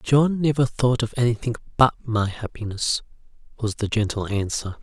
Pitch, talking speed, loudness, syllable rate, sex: 115 Hz, 150 wpm, -23 LUFS, 4.7 syllables/s, male